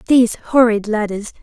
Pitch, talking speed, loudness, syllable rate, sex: 225 Hz, 125 wpm, -16 LUFS, 5.1 syllables/s, female